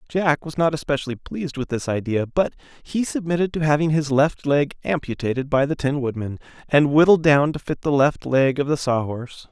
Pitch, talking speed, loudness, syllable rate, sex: 145 Hz, 210 wpm, -21 LUFS, 5.4 syllables/s, male